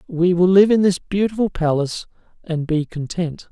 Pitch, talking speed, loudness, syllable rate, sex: 175 Hz, 170 wpm, -18 LUFS, 5.0 syllables/s, male